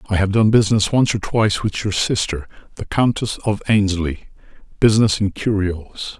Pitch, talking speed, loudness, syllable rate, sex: 100 Hz, 155 wpm, -18 LUFS, 5.4 syllables/s, male